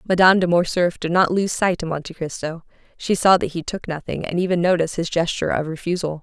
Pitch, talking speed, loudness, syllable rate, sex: 175 Hz, 220 wpm, -20 LUFS, 6.3 syllables/s, female